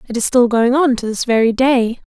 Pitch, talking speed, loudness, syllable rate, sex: 240 Hz, 255 wpm, -15 LUFS, 5.3 syllables/s, female